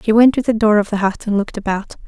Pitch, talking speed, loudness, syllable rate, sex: 215 Hz, 320 wpm, -16 LUFS, 6.7 syllables/s, female